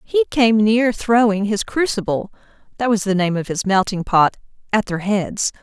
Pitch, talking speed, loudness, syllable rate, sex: 210 Hz, 160 wpm, -18 LUFS, 4.6 syllables/s, female